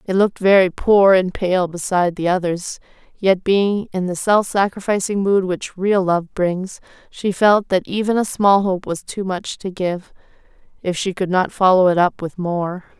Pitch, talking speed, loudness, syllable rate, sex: 190 Hz, 190 wpm, -18 LUFS, 4.4 syllables/s, female